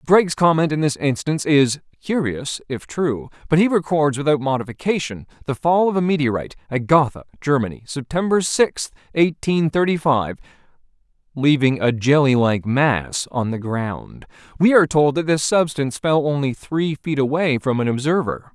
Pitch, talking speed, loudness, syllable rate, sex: 145 Hz, 160 wpm, -19 LUFS, 5.0 syllables/s, male